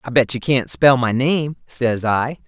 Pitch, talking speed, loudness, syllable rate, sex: 130 Hz, 220 wpm, -18 LUFS, 4.0 syllables/s, male